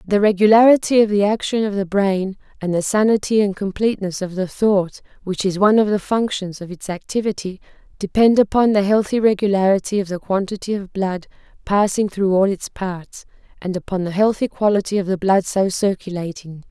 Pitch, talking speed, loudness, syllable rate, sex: 200 Hz, 180 wpm, -18 LUFS, 5.5 syllables/s, female